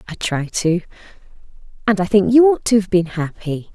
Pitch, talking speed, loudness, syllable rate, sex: 195 Hz, 190 wpm, -17 LUFS, 5.1 syllables/s, female